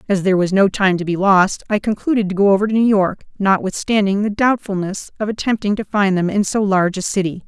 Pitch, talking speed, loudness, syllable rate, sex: 200 Hz, 235 wpm, -17 LUFS, 6.0 syllables/s, female